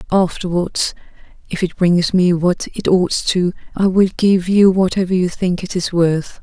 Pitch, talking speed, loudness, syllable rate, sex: 180 Hz, 170 wpm, -16 LUFS, 4.5 syllables/s, female